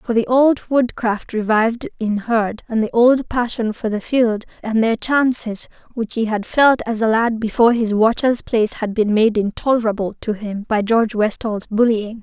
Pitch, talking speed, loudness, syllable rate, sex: 225 Hz, 185 wpm, -18 LUFS, 4.8 syllables/s, female